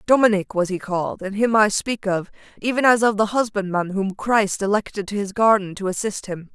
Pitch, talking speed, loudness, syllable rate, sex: 205 Hz, 210 wpm, -21 LUFS, 5.4 syllables/s, female